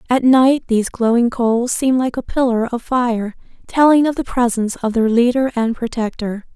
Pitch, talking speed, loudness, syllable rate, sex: 240 Hz, 185 wpm, -16 LUFS, 5.1 syllables/s, female